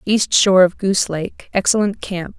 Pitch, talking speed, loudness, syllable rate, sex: 190 Hz, 150 wpm, -17 LUFS, 5.0 syllables/s, female